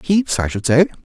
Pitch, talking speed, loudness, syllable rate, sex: 140 Hz, 215 wpm, -17 LUFS, 5.1 syllables/s, male